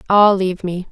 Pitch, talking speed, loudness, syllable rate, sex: 190 Hz, 195 wpm, -16 LUFS, 5.6 syllables/s, female